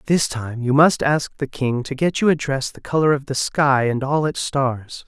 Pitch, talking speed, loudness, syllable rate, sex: 140 Hz, 250 wpm, -20 LUFS, 4.5 syllables/s, male